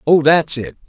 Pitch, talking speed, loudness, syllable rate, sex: 150 Hz, 205 wpm, -15 LUFS, 4.7 syllables/s, male